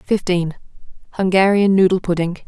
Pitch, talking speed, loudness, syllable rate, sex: 185 Hz, 75 wpm, -17 LUFS, 5.0 syllables/s, female